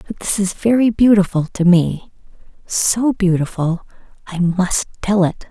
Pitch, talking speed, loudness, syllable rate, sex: 190 Hz, 130 wpm, -16 LUFS, 4.3 syllables/s, female